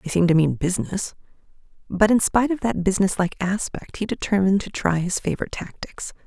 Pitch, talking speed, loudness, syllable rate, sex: 190 Hz, 180 wpm, -22 LUFS, 6.4 syllables/s, female